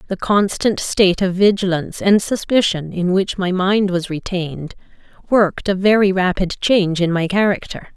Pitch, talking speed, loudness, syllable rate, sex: 190 Hz, 160 wpm, -17 LUFS, 5.0 syllables/s, female